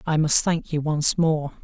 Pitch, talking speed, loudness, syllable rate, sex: 155 Hz, 220 wpm, -21 LUFS, 4.1 syllables/s, male